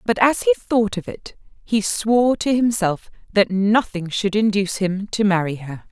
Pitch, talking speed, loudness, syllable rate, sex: 205 Hz, 180 wpm, -19 LUFS, 4.6 syllables/s, female